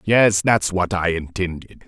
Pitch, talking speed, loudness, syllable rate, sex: 95 Hz, 160 wpm, -19 LUFS, 4.1 syllables/s, male